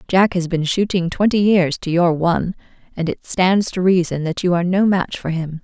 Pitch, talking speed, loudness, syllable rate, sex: 180 Hz, 225 wpm, -18 LUFS, 5.1 syllables/s, female